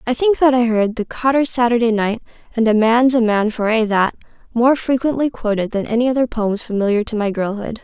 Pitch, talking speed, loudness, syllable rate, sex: 230 Hz, 215 wpm, -17 LUFS, 5.6 syllables/s, female